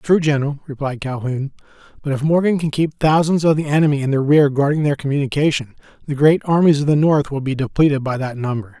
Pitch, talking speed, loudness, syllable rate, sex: 145 Hz, 210 wpm, -17 LUFS, 6.2 syllables/s, male